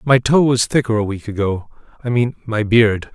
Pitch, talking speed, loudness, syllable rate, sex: 115 Hz, 190 wpm, -17 LUFS, 5.0 syllables/s, male